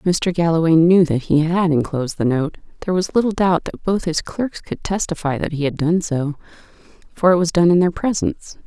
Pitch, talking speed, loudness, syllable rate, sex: 170 Hz, 215 wpm, -18 LUFS, 5.4 syllables/s, female